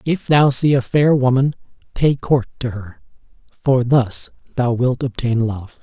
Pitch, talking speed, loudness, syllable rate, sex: 125 Hz, 165 wpm, -17 LUFS, 4.0 syllables/s, male